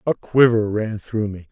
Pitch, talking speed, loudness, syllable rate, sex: 110 Hz, 200 wpm, -19 LUFS, 4.3 syllables/s, male